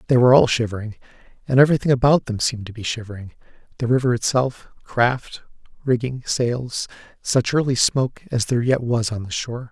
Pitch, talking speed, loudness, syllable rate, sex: 120 Hz, 175 wpm, -20 LUFS, 5.9 syllables/s, male